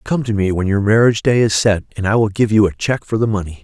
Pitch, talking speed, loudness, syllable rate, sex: 105 Hz, 315 wpm, -16 LUFS, 6.7 syllables/s, male